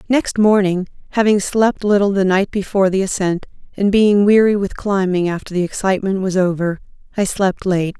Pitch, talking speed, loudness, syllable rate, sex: 195 Hz, 175 wpm, -16 LUFS, 5.2 syllables/s, female